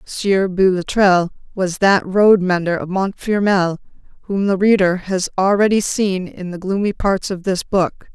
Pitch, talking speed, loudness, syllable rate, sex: 190 Hz, 155 wpm, -17 LUFS, 4.3 syllables/s, female